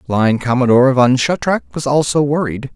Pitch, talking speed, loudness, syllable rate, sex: 130 Hz, 150 wpm, -15 LUFS, 5.3 syllables/s, male